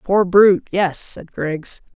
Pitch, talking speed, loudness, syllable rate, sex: 180 Hz, 150 wpm, -17 LUFS, 3.5 syllables/s, female